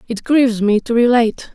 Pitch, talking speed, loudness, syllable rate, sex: 235 Hz, 195 wpm, -15 LUFS, 5.8 syllables/s, female